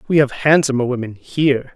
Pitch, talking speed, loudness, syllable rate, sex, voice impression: 135 Hz, 170 wpm, -17 LUFS, 5.7 syllables/s, male, masculine, adult-like, clear, fluent, sincere, slightly elegant, slightly sweet